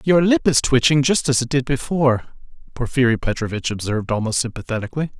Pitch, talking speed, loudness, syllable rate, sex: 130 Hz, 160 wpm, -19 LUFS, 6.4 syllables/s, male